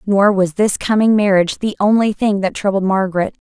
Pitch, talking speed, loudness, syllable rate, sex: 200 Hz, 190 wpm, -15 LUFS, 5.6 syllables/s, female